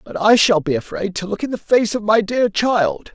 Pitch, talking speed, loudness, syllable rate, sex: 205 Hz, 265 wpm, -17 LUFS, 4.9 syllables/s, male